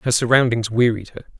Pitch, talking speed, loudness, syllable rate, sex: 120 Hz, 170 wpm, -18 LUFS, 5.4 syllables/s, male